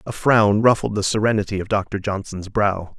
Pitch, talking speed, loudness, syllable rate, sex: 105 Hz, 180 wpm, -20 LUFS, 5.3 syllables/s, male